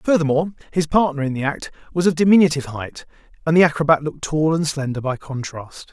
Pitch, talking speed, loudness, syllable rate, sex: 150 Hz, 195 wpm, -19 LUFS, 6.4 syllables/s, male